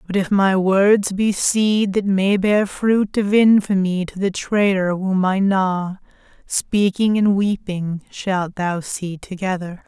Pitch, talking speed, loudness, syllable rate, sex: 195 Hz, 150 wpm, -18 LUFS, 3.5 syllables/s, female